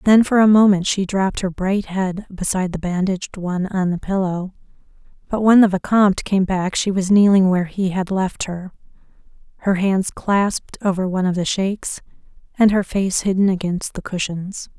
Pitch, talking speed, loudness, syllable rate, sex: 190 Hz, 185 wpm, -18 LUFS, 5.1 syllables/s, female